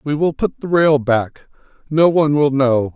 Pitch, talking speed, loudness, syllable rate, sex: 145 Hz, 205 wpm, -16 LUFS, 4.5 syllables/s, male